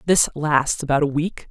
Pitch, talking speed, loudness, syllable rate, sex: 150 Hz, 200 wpm, -20 LUFS, 4.6 syllables/s, female